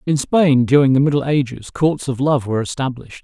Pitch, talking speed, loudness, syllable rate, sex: 135 Hz, 205 wpm, -17 LUFS, 5.8 syllables/s, male